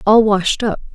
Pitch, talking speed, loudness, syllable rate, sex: 210 Hz, 190 wpm, -15 LUFS, 4.2 syllables/s, female